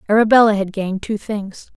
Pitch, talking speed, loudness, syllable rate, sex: 205 Hz, 165 wpm, -17 LUFS, 5.7 syllables/s, female